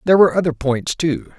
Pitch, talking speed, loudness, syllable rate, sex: 160 Hz, 215 wpm, -17 LUFS, 6.6 syllables/s, male